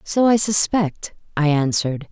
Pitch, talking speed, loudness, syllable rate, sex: 175 Hz, 140 wpm, -18 LUFS, 4.4 syllables/s, female